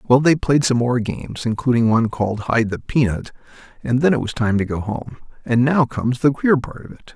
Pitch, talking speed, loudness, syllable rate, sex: 125 Hz, 235 wpm, -19 LUFS, 5.7 syllables/s, male